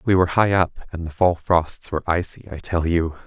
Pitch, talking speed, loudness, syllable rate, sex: 85 Hz, 240 wpm, -21 LUFS, 5.5 syllables/s, male